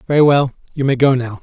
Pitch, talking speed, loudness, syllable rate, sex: 135 Hz, 250 wpm, -15 LUFS, 6.6 syllables/s, male